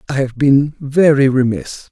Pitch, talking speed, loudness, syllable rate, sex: 135 Hz, 155 wpm, -14 LUFS, 4.2 syllables/s, male